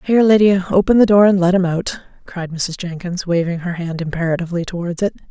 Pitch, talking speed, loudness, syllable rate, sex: 180 Hz, 205 wpm, -17 LUFS, 6.1 syllables/s, female